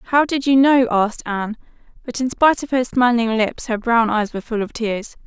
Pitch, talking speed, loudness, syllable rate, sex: 235 Hz, 230 wpm, -18 LUFS, 5.4 syllables/s, female